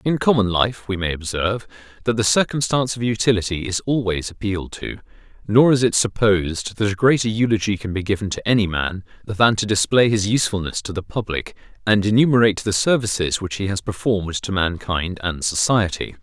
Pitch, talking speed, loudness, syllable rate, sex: 105 Hz, 180 wpm, -20 LUFS, 5.7 syllables/s, male